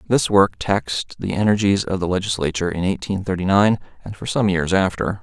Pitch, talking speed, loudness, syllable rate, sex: 95 Hz, 195 wpm, -20 LUFS, 5.7 syllables/s, male